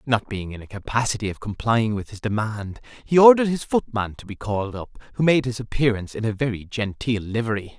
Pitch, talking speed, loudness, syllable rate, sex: 115 Hz, 210 wpm, -22 LUFS, 6.0 syllables/s, male